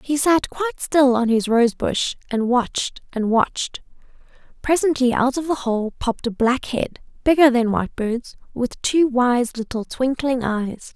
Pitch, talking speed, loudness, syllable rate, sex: 255 Hz, 165 wpm, -20 LUFS, 4.4 syllables/s, female